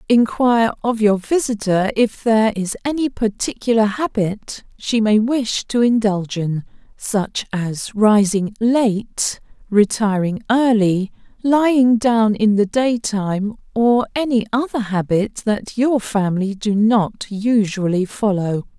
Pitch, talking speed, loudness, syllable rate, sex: 215 Hz, 120 wpm, -18 LUFS, 3.9 syllables/s, female